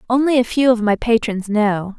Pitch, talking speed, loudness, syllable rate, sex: 225 Hz, 210 wpm, -17 LUFS, 5.1 syllables/s, female